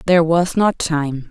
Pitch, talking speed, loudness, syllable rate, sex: 165 Hz, 185 wpm, -17 LUFS, 4.4 syllables/s, female